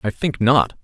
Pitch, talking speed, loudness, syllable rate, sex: 115 Hz, 215 wpm, -18 LUFS, 4.2 syllables/s, male